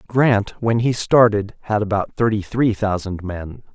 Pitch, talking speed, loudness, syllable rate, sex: 105 Hz, 160 wpm, -19 LUFS, 4.2 syllables/s, male